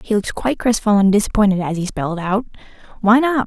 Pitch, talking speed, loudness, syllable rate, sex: 210 Hz, 210 wpm, -17 LUFS, 7.0 syllables/s, female